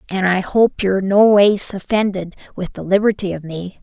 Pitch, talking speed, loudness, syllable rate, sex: 195 Hz, 170 wpm, -16 LUFS, 4.9 syllables/s, female